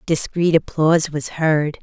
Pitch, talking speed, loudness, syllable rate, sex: 155 Hz, 130 wpm, -18 LUFS, 4.1 syllables/s, female